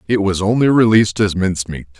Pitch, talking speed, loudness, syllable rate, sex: 100 Hz, 210 wpm, -15 LUFS, 6.4 syllables/s, male